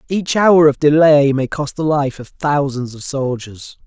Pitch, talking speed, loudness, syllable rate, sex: 145 Hz, 185 wpm, -15 LUFS, 4.1 syllables/s, male